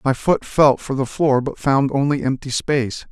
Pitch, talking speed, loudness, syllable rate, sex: 135 Hz, 210 wpm, -19 LUFS, 4.7 syllables/s, male